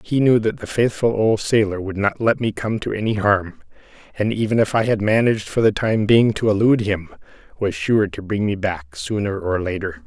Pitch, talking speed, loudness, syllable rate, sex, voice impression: 105 Hz, 220 wpm, -19 LUFS, 5.2 syllables/s, male, very masculine, very adult-like, slightly old, thick, slightly relaxed, powerful, slightly dark, soft, slightly muffled, slightly fluent, slightly raspy, cool, very intellectual, slightly refreshing, very sincere, very calm, very mature, friendly, very reassuring, unique, elegant, wild, sweet, slightly lively, kind, slightly modest